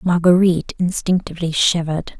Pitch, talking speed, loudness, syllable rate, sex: 175 Hz, 80 wpm, -17 LUFS, 5.9 syllables/s, female